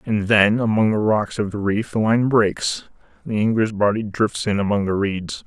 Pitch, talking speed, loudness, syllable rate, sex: 105 Hz, 210 wpm, -20 LUFS, 4.6 syllables/s, male